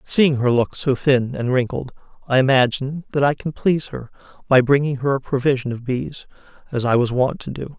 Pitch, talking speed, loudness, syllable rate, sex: 135 Hz, 210 wpm, -19 LUFS, 5.4 syllables/s, male